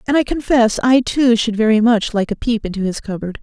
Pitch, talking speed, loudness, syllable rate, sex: 225 Hz, 245 wpm, -16 LUFS, 5.5 syllables/s, female